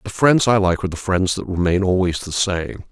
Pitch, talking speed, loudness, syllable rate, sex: 95 Hz, 245 wpm, -18 LUFS, 5.6 syllables/s, male